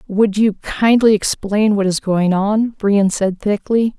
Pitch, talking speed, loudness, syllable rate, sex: 205 Hz, 165 wpm, -16 LUFS, 3.7 syllables/s, female